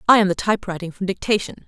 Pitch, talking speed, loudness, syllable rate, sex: 190 Hz, 215 wpm, -21 LUFS, 7.3 syllables/s, female